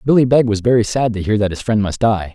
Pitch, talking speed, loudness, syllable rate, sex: 110 Hz, 310 wpm, -16 LUFS, 6.2 syllables/s, male